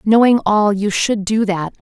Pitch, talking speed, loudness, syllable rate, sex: 210 Hz, 190 wpm, -15 LUFS, 4.1 syllables/s, female